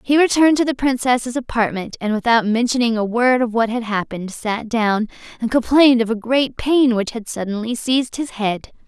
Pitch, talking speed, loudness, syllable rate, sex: 235 Hz, 195 wpm, -18 LUFS, 5.3 syllables/s, female